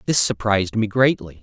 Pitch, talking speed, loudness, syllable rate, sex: 110 Hz, 170 wpm, -19 LUFS, 5.5 syllables/s, male